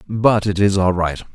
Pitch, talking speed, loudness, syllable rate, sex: 100 Hz, 225 wpm, -17 LUFS, 4.4 syllables/s, male